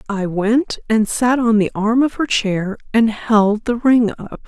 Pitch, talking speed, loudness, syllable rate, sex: 225 Hz, 200 wpm, -17 LUFS, 3.8 syllables/s, female